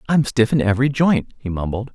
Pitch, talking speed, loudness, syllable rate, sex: 125 Hz, 215 wpm, -19 LUFS, 6.0 syllables/s, male